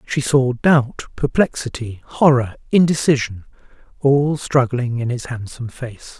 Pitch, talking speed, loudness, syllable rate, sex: 130 Hz, 115 wpm, -18 LUFS, 4.2 syllables/s, male